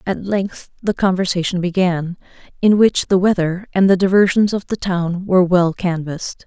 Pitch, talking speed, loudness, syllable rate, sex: 185 Hz, 165 wpm, -17 LUFS, 4.9 syllables/s, female